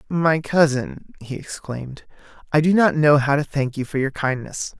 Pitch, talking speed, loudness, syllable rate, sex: 145 Hz, 190 wpm, -20 LUFS, 4.7 syllables/s, male